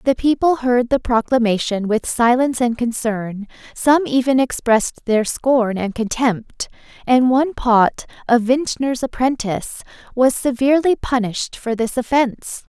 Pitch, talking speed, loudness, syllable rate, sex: 245 Hz, 130 wpm, -18 LUFS, 4.5 syllables/s, female